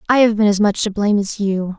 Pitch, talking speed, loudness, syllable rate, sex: 205 Hz, 305 wpm, -16 LUFS, 6.2 syllables/s, female